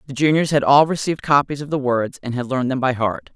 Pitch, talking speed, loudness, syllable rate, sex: 135 Hz, 270 wpm, -19 LUFS, 6.4 syllables/s, female